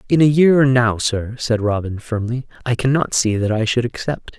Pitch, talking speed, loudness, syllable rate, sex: 120 Hz, 220 wpm, -18 LUFS, 5.0 syllables/s, male